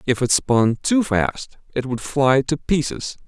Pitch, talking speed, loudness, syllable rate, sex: 135 Hz, 185 wpm, -20 LUFS, 3.8 syllables/s, male